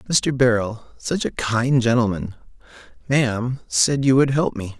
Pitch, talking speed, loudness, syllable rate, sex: 120 Hz, 125 wpm, -20 LUFS, 4.1 syllables/s, male